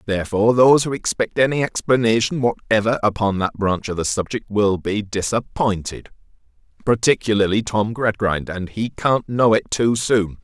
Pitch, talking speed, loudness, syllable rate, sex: 110 Hz, 145 wpm, -19 LUFS, 5.0 syllables/s, male